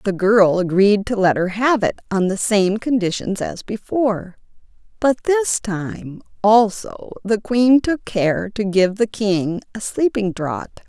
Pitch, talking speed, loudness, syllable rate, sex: 205 Hz, 160 wpm, -18 LUFS, 3.8 syllables/s, female